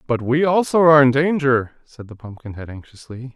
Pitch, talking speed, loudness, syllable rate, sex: 130 Hz, 180 wpm, -16 LUFS, 5.5 syllables/s, male